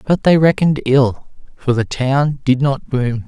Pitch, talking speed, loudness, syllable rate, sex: 135 Hz, 185 wpm, -16 LUFS, 4.2 syllables/s, male